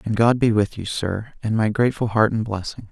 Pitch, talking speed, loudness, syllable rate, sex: 110 Hz, 245 wpm, -21 LUFS, 5.6 syllables/s, male